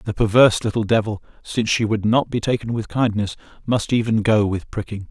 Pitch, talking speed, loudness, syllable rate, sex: 110 Hz, 200 wpm, -20 LUFS, 5.7 syllables/s, male